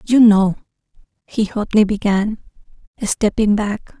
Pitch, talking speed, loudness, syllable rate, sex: 210 Hz, 105 wpm, -17 LUFS, 3.9 syllables/s, female